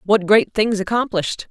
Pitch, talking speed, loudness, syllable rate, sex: 205 Hz, 160 wpm, -18 LUFS, 5.0 syllables/s, female